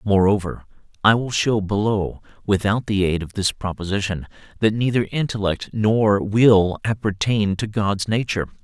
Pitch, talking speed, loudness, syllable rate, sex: 105 Hz, 140 wpm, -20 LUFS, 4.6 syllables/s, male